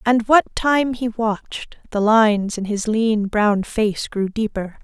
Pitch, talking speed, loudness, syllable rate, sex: 220 Hz, 175 wpm, -19 LUFS, 3.9 syllables/s, female